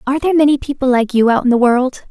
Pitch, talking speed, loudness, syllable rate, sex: 260 Hz, 285 wpm, -14 LUFS, 7.1 syllables/s, female